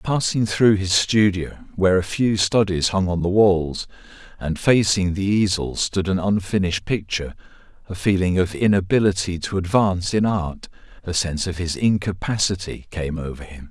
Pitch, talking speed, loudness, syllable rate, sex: 95 Hz, 160 wpm, -20 LUFS, 5.0 syllables/s, male